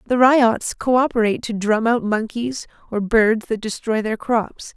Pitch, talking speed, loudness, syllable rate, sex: 225 Hz, 165 wpm, -19 LUFS, 4.4 syllables/s, female